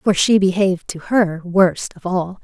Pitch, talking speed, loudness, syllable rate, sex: 185 Hz, 195 wpm, -17 LUFS, 4.3 syllables/s, female